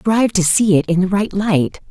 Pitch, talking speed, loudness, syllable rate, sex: 190 Hz, 250 wpm, -15 LUFS, 5.0 syllables/s, female